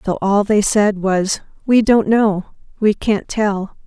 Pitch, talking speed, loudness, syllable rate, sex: 205 Hz, 155 wpm, -16 LUFS, 3.6 syllables/s, female